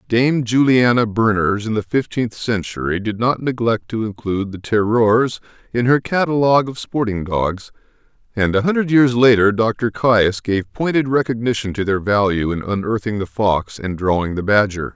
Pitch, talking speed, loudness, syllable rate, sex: 110 Hz, 165 wpm, -18 LUFS, 4.9 syllables/s, male